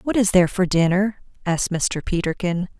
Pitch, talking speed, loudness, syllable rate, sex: 185 Hz, 170 wpm, -21 LUFS, 5.4 syllables/s, female